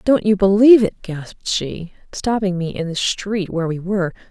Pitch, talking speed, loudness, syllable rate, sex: 190 Hz, 195 wpm, -18 LUFS, 5.3 syllables/s, female